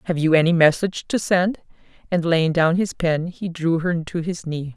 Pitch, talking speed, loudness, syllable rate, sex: 170 Hz, 215 wpm, -20 LUFS, 4.9 syllables/s, female